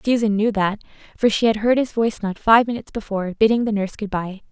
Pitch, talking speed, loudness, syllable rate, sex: 215 Hz, 240 wpm, -20 LUFS, 6.7 syllables/s, female